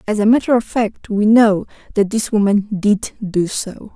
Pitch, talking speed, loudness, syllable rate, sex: 210 Hz, 195 wpm, -16 LUFS, 4.4 syllables/s, female